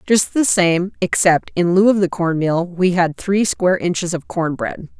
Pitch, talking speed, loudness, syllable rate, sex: 180 Hz, 215 wpm, -17 LUFS, 4.5 syllables/s, female